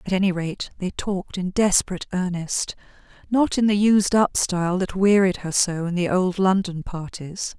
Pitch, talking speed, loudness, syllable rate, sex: 185 Hz, 175 wpm, -22 LUFS, 4.9 syllables/s, female